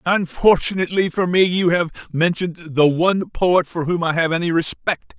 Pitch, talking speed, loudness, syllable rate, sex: 170 Hz, 175 wpm, -18 LUFS, 5.1 syllables/s, male